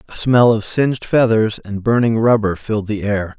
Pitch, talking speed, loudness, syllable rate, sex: 110 Hz, 195 wpm, -16 LUFS, 5.1 syllables/s, male